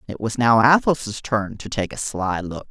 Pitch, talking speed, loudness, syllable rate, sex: 110 Hz, 220 wpm, -20 LUFS, 4.4 syllables/s, male